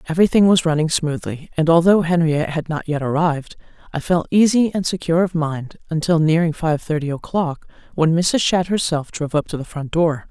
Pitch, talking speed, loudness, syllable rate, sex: 160 Hz, 190 wpm, -18 LUFS, 5.6 syllables/s, female